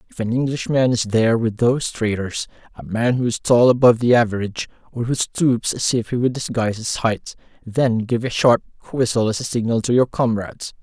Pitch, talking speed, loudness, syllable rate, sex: 120 Hz, 210 wpm, -19 LUFS, 5.6 syllables/s, male